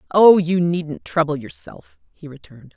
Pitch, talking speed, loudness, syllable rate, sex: 165 Hz, 150 wpm, -17 LUFS, 4.6 syllables/s, female